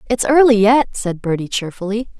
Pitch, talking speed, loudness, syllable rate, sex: 220 Hz, 165 wpm, -16 LUFS, 5.1 syllables/s, female